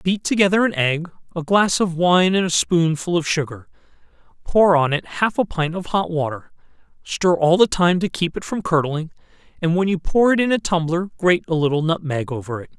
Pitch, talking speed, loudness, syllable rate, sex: 170 Hz, 210 wpm, -19 LUFS, 5.2 syllables/s, male